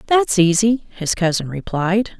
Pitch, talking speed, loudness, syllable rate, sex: 200 Hz, 135 wpm, -18 LUFS, 4.2 syllables/s, female